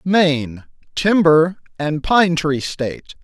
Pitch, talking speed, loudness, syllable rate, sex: 160 Hz, 110 wpm, -17 LUFS, 3.7 syllables/s, male